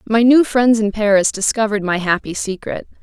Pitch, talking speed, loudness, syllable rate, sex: 215 Hz, 180 wpm, -16 LUFS, 5.4 syllables/s, female